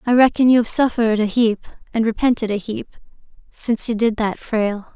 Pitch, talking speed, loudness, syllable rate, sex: 225 Hz, 180 wpm, -18 LUFS, 5.7 syllables/s, female